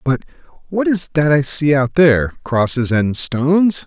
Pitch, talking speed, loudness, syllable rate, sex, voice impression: 145 Hz, 155 wpm, -15 LUFS, 4.5 syllables/s, male, masculine, very adult-like, slightly soft, slightly cool, slightly calm, friendly, kind